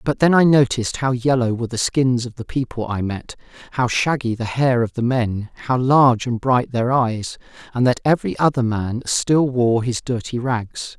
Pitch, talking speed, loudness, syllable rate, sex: 125 Hz, 200 wpm, -19 LUFS, 4.9 syllables/s, male